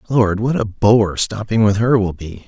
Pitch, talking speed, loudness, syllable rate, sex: 105 Hz, 220 wpm, -16 LUFS, 4.4 syllables/s, male